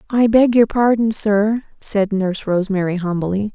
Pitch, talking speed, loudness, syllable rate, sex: 205 Hz, 150 wpm, -17 LUFS, 4.7 syllables/s, female